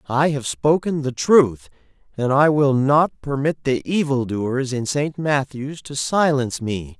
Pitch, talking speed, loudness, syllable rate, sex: 140 Hz, 165 wpm, -20 LUFS, 4.0 syllables/s, male